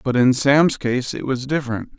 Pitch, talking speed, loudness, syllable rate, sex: 130 Hz, 210 wpm, -19 LUFS, 4.8 syllables/s, male